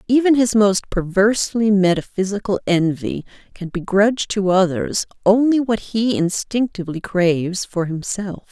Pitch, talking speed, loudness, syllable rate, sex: 200 Hz, 120 wpm, -18 LUFS, 4.6 syllables/s, female